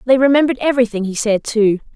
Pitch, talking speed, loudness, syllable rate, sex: 235 Hz, 185 wpm, -15 LUFS, 7.0 syllables/s, female